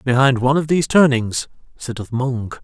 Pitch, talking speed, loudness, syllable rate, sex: 130 Hz, 160 wpm, -17 LUFS, 5.5 syllables/s, male